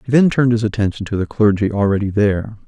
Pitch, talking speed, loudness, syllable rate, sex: 105 Hz, 225 wpm, -17 LUFS, 6.8 syllables/s, male